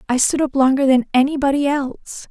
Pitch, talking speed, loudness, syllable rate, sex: 270 Hz, 185 wpm, -17 LUFS, 5.9 syllables/s, female